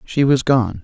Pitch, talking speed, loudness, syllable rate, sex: 130 Hz, 215 wpm, -16 LUFS, 4.1 syllables/s, male